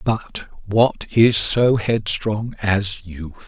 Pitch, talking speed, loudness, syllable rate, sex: 105 Hz, 120 wpm, -19 LUFS, 2.7 syllables/s, male